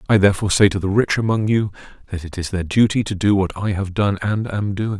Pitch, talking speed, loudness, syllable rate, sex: 100 Hz, 265 wpm, -19 LUFS, 6.1 syllables/s, male